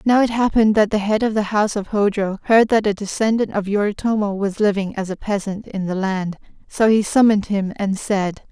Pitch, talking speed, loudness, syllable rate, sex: 205 Hz, 220 wpm, -19 LUFS, 5.5 syllables/s, female